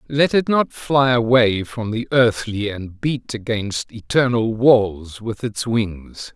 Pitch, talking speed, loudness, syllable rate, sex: 115 Hz, 150 wpm, -19 LUFS, 3.4 syllables/s, male